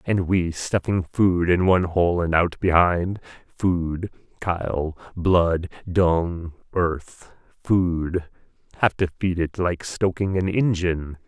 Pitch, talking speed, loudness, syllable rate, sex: 90 Hz, 130 wpm, -22 LUFS, 3.4 syllables/s, male